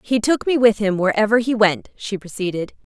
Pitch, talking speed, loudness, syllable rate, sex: 215 Hz, 205 wpm, -19 LUFS, 5.4 syllables/s, female